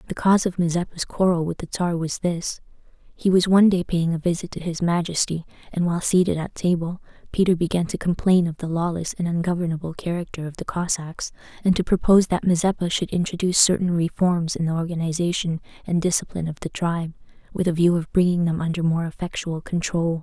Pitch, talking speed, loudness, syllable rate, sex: 170 Hz, 195 wpm, -22 LUFS, 6.1 syllables/s, female